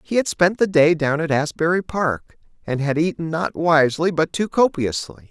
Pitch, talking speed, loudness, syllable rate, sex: 160 Hz, 190 wpm, -20 LUFS, 4.9 syllables/s, male